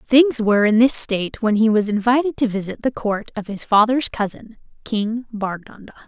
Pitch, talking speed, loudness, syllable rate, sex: 225 Hz, 190 wpm, -18 LUFS, 5.2 syllables/s, female